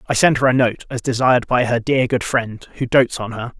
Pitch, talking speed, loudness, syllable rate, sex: 120 Hz, 265 wpm, -18 LUFS, 5.5 syllables/s, male